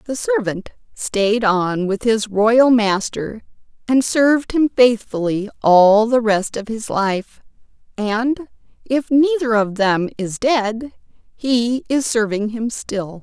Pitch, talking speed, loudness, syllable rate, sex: 225 Hz, 135 wpm, -17 LUFS, 3.4 syllables/s, female